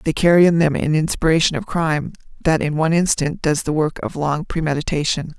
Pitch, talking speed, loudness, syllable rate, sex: 155 Hz, 200 wpm, -18 LUFS, 5.9 syllables/s, female